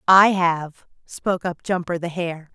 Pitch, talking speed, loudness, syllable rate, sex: 175 Hz, 165 wpm, -21 LUFS, 4.1 syllables/s, female